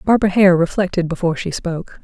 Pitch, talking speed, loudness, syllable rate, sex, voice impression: 180 Hz, 175 wpm, -17 LUFS, 6.7 syllables/s, female, feminine, slightly middle-aged, tensed, powerful, soft, slightly raspy, intellectual, calm, friendly, reassuring, elegant, lively, kind